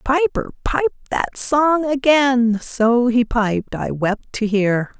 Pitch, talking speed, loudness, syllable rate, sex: 250 Hz, 145 wpm, -18 LUFS, 3.2 syllables/s, female